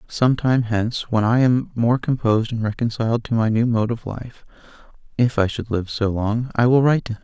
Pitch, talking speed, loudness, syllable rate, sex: 115 Hz, 225 wpm, -20 LUFS, 5.4 syllables/s, male